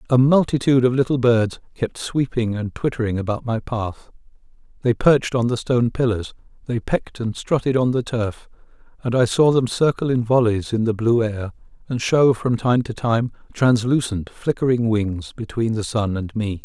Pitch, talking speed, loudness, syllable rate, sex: 120 Hz, 180 wpm, -20 LUFS, 5.0 syllables/s, male